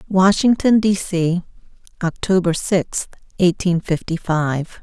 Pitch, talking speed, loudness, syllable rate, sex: 180 Hz, 100 wpm, -18 LUFS, 3.7 syllables/s, female